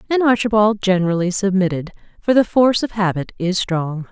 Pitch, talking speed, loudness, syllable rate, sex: 200 Hz, 160 wpm, -18 LUFS, 5.6 syllables/s, female